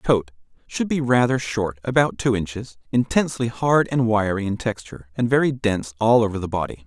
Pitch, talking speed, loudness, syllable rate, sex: 110 Hz, 175 wpm, -21 LUFS, 5.2 syllables/s, male